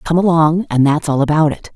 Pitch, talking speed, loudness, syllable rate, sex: 155 Hz, 240 wpm, -14 LUFS, 5.6 syllables/s, female